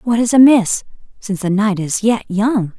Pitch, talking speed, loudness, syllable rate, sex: 210 Hz, 195 wpm, -15 LUFS, 4.7 syllables/s, female